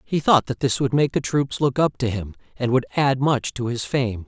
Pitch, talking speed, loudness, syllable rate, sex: 130 Hz, 265 wpm, -21 LUFS, 5.0 syllables/s, male